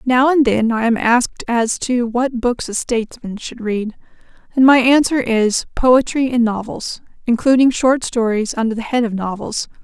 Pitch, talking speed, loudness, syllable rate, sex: 240 Hz, 170 wpm, -16 LUFS, 4.6 syllables/s, female